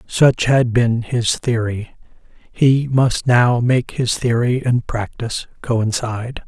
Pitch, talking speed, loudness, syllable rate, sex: 120 Hz, 130 wpm, -17 LUFS, 3.6 syllables/s, male